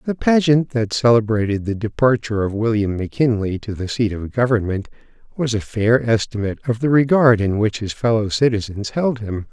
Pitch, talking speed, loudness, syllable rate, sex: 115 Hz, 175 wpm, -19 LUFS, 5.4 syllables/s, male